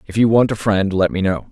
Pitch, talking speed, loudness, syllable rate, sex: 100 Hz, 315 wpm, -17 LUFS, 5.8 syllables/s, male